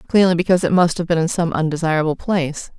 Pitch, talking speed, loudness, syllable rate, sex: 170 Hz, 215 wpm, -18 LUFS, 7.0 syllables/s, female